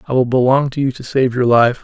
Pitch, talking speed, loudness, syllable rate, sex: 130 Hz, 295 wpm, -15 LUFS, 5.8 syllables/s, male